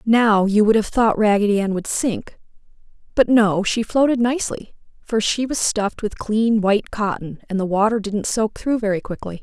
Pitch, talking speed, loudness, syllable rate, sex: 215 Hz, 190 wpm, -19 LUFS, 5.0 syllables/s, female